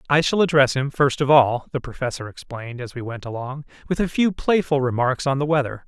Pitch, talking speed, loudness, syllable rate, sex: 135 Hz, 225 wpm, -21 LUFS, 5.8 syllables/s, male